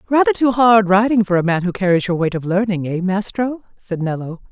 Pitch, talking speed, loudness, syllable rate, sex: 200 Hz, 225 wpm, -17 LUFS, 5.6 syllables/s, female